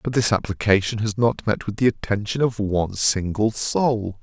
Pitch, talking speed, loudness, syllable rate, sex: 105 Hz, 185 wpm, -21 LUFS, 4.8 syllables/s, male